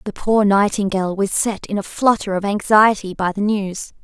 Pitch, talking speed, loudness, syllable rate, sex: 200 Hz, 210 wpm, -18 LUFS, 5.2 syllables/s, female